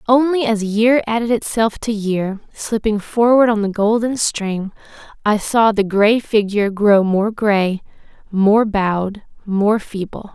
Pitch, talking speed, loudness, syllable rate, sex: 215 Hz, 145 wpm, -17 LUFS, 4.0 syllables/s, female